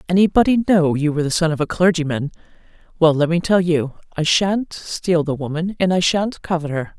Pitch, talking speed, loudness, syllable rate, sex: 170 Hz, 205 wpm, -18 LUFS, 5.4 syllables/s, female